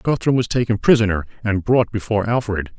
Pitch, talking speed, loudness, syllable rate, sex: 110 Hz, 170 wpm, -19 LUFS, 5.9 syllables/s, male